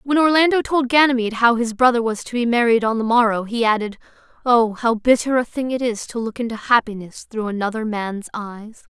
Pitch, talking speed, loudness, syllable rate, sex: 235 Hz, 210 wpm, -19 LUFS, 5.6 syllables/s, female